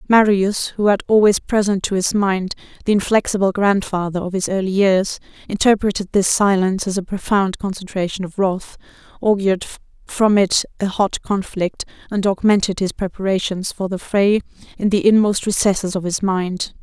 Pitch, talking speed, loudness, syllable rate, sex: 195 Hz, 155 wpm, -18 LUFS, 5.1 syllables/s, female